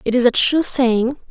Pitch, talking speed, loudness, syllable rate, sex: 255 Hz, 230 wpm, -16 LUFS, 4.4 syllables/s, female